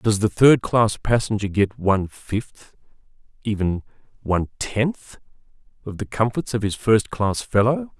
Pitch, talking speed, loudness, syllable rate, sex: 110 Hz, 145 wpm, -21 LUFS, 4.2 syllables/s, male